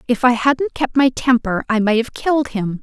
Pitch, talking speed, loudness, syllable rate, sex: 245 Hz, 235 wpm, -17 LUFS, 4.9 syllables/s, female